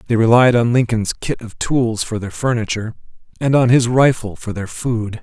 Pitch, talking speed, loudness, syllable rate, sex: 115 Hz, 195 wpm, -17 LUFS, 5.1 syllables/s, male